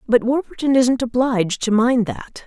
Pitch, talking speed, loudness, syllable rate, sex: 245 Hz, 170 wpm, -18 LUFS, 4.8 syllables/s, female